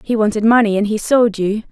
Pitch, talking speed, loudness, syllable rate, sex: 215 Hz, 245 wpm, -15 LUFS, 5.8 syllables/s, female